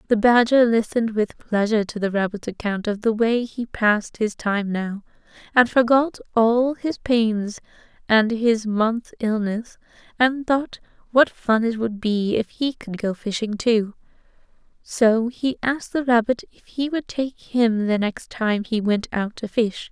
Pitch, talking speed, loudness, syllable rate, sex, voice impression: 225 Hz, 170 wpm, -21 LUFS, 4.2 syllables/s, female, feminine, adult-like, slightly cute, slightly calm, slightly friendly, reassuring, slightly kind